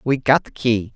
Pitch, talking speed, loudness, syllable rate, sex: 125 Hz, 250 wpm, -19 LUFS, 4.7 syllables/s, male